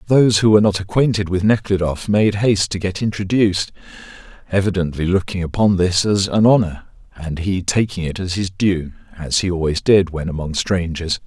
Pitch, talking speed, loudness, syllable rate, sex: 95 Hz, 175 wpm, -18 LUFS, 5.4 syllables/s, male